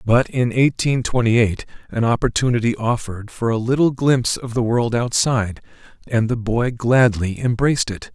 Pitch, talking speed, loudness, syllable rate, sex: 120 Hz, 160 wpm, -19 LUFS, 5.0 syllables/s, male